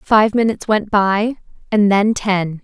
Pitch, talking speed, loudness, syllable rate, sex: 205 Hz, 160 wpm, -16 LUFS, 3.9 syllables/s, female